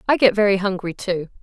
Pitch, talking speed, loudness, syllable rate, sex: 195 Hz, 210 wpm, -19 LUFS, 6.0 syllables/s, female